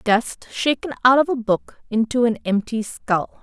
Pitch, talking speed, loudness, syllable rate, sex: 235 Hz, 175 wpm, -20 LUFS, 4.4 syllables/s, female